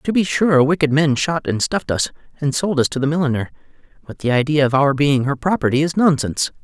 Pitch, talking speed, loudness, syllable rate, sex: 145 Hz, 225 wpm, -18 LUFS, 6.0 syllables/s, male